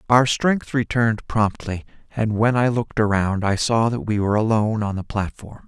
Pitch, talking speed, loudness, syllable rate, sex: 110 Hz, 190 wpm, -21 LUFS, 5.2 syllables/s, male